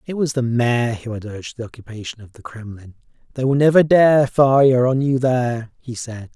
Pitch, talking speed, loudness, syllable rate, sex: 125 Hz, 210 wpm, -17 LUFS, 5.1 syllables/s, male